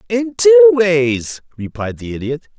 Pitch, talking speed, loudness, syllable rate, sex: 190 Hz, 140 wpm, -14 LUFS, 4.0 syllables/s, male